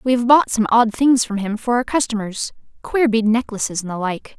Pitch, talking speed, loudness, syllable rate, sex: 230 Hz, 235 wpm, -18 LUFS, 5.2 syllables/s, female